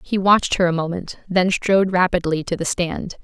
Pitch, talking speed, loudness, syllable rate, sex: 180 Hz, 205 wpm, -19 LUFS, 5.4 syllables/s, female